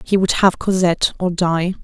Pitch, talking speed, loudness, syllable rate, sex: 180 Hz, 195 wpm, -17 LUFS, 4.9 syllables/s, female